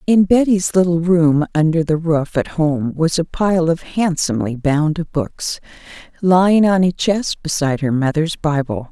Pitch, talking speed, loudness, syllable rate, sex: 165 Hz, 160 wpm, -17 LUFS, 4.4 syllables/s, female